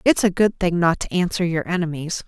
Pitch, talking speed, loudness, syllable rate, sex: 175 Hz, 235 wpm, -21 LUFS, 5.5 syllables/s, female